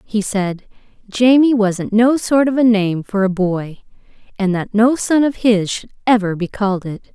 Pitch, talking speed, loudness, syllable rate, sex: 215 Hz, 195 wpm, -16 LUFS, 4.4 syllables/s, female